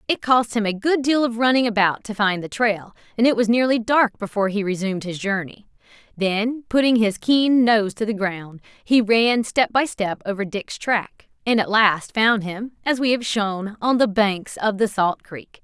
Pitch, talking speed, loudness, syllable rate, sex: 215 Hz, 210 wpm, -20 LUFS, 4.6 syllables/s, female